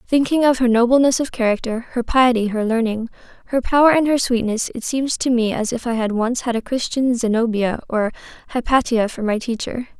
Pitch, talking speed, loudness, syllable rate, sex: 240 Hz, 200 wpm, -19 LUFS, 5.5 syllables/s, female